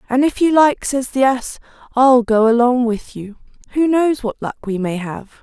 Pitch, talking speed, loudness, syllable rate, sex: 245 Hz, 210 wpm, -16 LUFS, 4.5 syllables/s, female